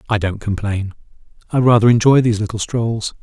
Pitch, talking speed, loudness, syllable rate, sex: 110 Hz, 165 wpm, -16 LUFS, 5.8 syllables/s, male